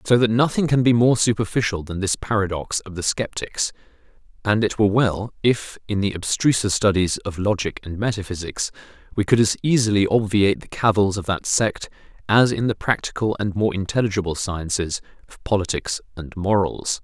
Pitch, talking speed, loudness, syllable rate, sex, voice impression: 105 Hz, 170 wpm, -21 LUFS, 5.3 syllables/s, male, masculine, adult-like, cool, sincere, slightly calm, slightly mature, slightly elegant